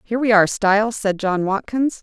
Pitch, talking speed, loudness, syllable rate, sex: 215 Hz, 210 wpm, -18 LUFS, 5.7 syllables/s, female